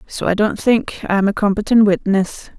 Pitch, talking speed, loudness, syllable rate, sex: 205 Hz, 185 wpm, -16 LUFS, 4.7 syllables/s, female